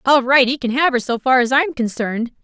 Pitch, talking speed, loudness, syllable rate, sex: 255 Hz, 295 wpm, -16 LUFS, 6.2 syllables/s, female